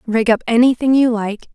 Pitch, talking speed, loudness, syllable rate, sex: 235 Hz, 195 wpm, -15 LUFS, 5.6 syllables/s, female